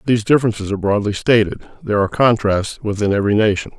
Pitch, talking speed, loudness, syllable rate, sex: 105 Hz, 175 wpm, -17 LUFS, 7.7 syllables/s, male